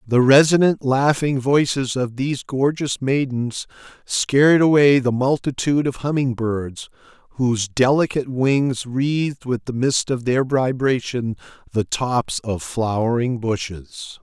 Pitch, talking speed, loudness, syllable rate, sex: 130 Hz, 125 wpm, -19 LUFS, 4.2 syllables/s, male